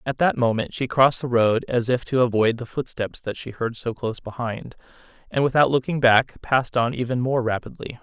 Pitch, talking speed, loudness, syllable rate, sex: 125 Hz, 210 wpm, -22 LUFS, 5.5 syllables/s, male